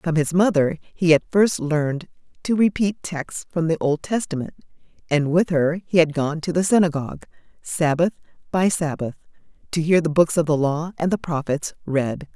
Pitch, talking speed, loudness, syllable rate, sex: 165 Hz, 180 wpm, -21 LUFS, 5.0 syllables/s, female